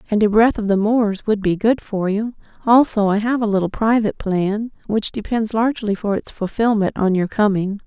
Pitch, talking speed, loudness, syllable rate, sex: 210 Hz, 205 wpm, -18 LUFS, 5.2 syllables/s, female